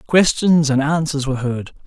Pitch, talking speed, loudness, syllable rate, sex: 145 Hz, 160 wpm, -17 LUFS, 4.9 syllables/s, male